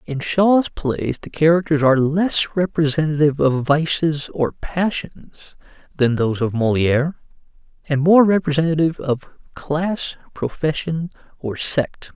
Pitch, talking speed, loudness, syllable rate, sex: 155 Hz, 120 wpm, -19 LUFS, 4.4 syllables/s, male